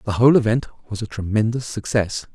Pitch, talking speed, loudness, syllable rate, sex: 110 Hz, 180 wpm, -20 LUFS, 6.0 syllables/s, male